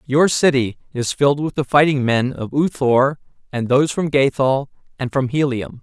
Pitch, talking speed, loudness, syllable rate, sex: 135 Hz, 185 wpm, -18 LUFS, 4.9 syllables/s, male